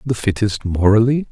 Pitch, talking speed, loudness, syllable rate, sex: 110 Hz, 135 wpm, -17 LUFS, 5.0 syllables/s, male